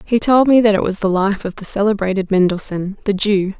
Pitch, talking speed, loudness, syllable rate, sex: 200 Hz, 235 wpm, -16 LUFS, 5.6 syllables/s, female